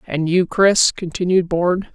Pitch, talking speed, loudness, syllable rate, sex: 175 Hz, 155 wpm, -17 LUFS, 4.4 syllables/s, female